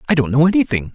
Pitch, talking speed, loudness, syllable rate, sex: 150 Hz, 255 wpm, -16 LUFS, 8.2 syllables/s, male